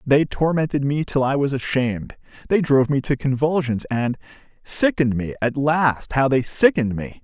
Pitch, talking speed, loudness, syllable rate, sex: 140 Hz, 165 wpm, -20 LUFS, 5.1 syllables/s, male